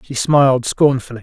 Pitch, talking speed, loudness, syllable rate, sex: 130 Hz, 145 wpm, -14 LUFS, 5.3 syllables/s, male